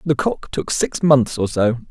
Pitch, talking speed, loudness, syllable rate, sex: 135 Hz, 190 wpm, -18 LUFS, 4.1 syllables/s, male